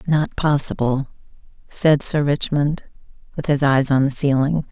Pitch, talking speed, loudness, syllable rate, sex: 145 Hz, 140 wpm, -19 LUFS, 4.3 syllables/s, female